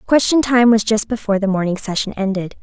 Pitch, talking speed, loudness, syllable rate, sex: 215 Hz, 205 wpm, -16 LUFS, 6.1 syllables/s, female